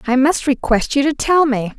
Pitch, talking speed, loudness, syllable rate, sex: 270 Hz, 235 wpm, -16 LUFS, 4.9 syllables/s, female